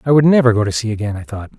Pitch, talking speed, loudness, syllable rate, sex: 120 Hz, 340 wpm, -15 LUFS, 7.8 syllables/s, male